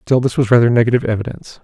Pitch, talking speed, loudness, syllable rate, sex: 120 Hz, 220 wpm, -15 LUFS, 8.2 syllables/s, male